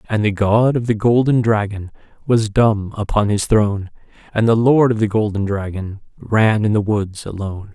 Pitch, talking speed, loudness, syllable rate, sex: 105 Hz, 185 wpm, -17 LUFS, 4.9 syllables/s, male